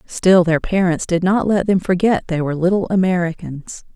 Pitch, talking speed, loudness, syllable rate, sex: 180 Hz, 180 wpm, -17 LUFS, 5.1 syllables/s, female